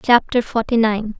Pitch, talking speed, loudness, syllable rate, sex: 225 Hz, 150 wpm, -17 LUFS, 4.6 syllables/s, female